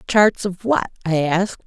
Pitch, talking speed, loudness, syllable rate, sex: 185 Hz, 180 wpm, -19 LUFS, 4.5 syllables/s, female